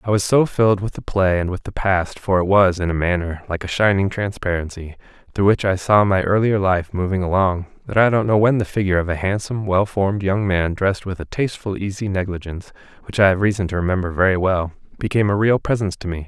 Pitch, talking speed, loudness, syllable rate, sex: 95 Hz, 230 wpm, -19 LUFS, 6.2 syllables/s, male